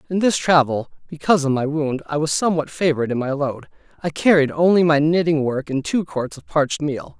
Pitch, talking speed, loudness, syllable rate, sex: 150 Hz, 215 wpm, -19 LUFS, 5.7 syllables/s, male